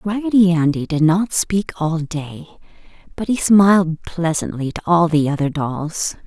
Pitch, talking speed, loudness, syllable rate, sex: 170 Hz, 155 wpm, -18 LUFS, 4.3 syllables/s, female